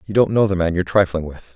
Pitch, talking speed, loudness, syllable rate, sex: 95 Hz, 310 wpm, -18 LUFS, 7.0 syllables/s, male